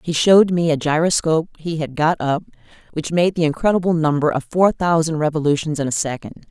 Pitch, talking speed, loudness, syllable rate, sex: 160 Hz, 195 wpm, -18 LUFS, 6.0 syllables/s, female